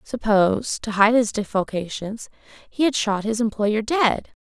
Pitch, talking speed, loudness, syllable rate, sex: 220 Hz, 150 wpm, -21 LUFS, 4.4 syllables/s, female